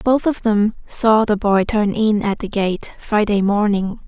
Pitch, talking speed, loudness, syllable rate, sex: 210 Hz, 190 wpm, -18 LUFS, 4.0 syllables/s, female